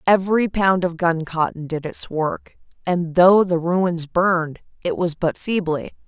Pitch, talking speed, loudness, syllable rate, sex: 175 Hz, 160 wpm, -20 LUFS, 4.1 syllables/s, female